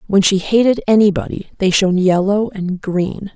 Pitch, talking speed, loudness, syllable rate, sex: 195 Hz, 160 wpm, -15 LUFS, 4.9 syllables/s, female